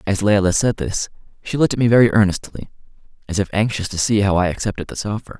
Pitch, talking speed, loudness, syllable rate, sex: 100 Hz, 220 wpm, -18 LUFS, 6.7 syllables/s, male